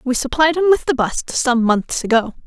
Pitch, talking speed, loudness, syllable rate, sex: 265 Hz, 220 wpm, -17 LUFS, 5.1 syllables/s, female